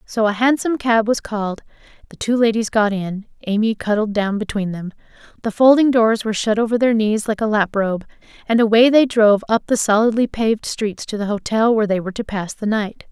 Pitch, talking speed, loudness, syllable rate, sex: 220 Hz, 215 wpm, -18 LUFS, 5.7 syllables/s, female